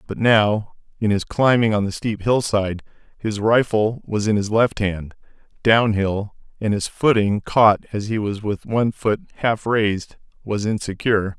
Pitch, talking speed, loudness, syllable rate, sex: 105 Hz, 165 wpm, -20 LUFS, 4.5 syllables/s, male